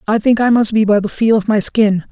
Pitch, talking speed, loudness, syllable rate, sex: 215 Hz, 315 wpm, -13 LUFS, 5.7 syllables/s, male